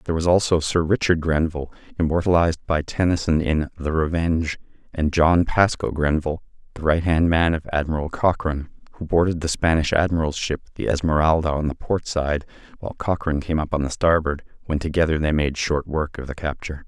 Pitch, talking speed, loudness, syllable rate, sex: 80 Hz, 180 wpm, -22 LUFS, 5.9 syllables/s, male